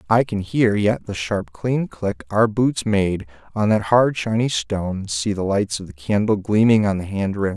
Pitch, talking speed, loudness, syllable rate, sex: 105 Hz, 200 wpm, -20 LUFS, 4.4 syllables/s, male